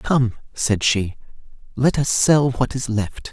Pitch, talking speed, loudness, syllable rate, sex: 125 Hz, 165 wpm, -20 LUFS, 3.6 syllables/s, male